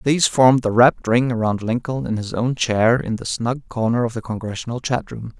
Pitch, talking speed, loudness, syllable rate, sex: 120 Hz, 220 wpm, -19 LUFS, 5.3 syllables/s, male